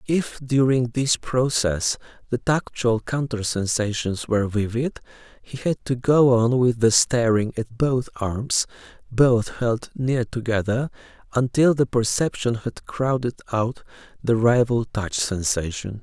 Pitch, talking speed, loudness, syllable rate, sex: 120 Hz, 130 wpm, -22 LUFS, 3.9 syllables/s, male